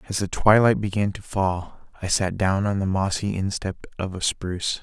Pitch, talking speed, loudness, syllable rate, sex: 95 Hz, 200 wpm, -23 LUFS, 5.0 syllables/s, male